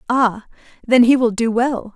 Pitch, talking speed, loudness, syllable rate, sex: 235 Hz, 185 wpm, -16 LUFS, 4.3 syllables/s, female